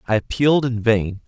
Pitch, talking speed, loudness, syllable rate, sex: 115 Hz, 190 wpm, -19 LUFS, 5.6 syllables/s, male